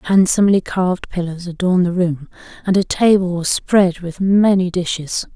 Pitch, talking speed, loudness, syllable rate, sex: 180 Hz, 155 wpm, -16 LUFS, 5.1 syllables/s, female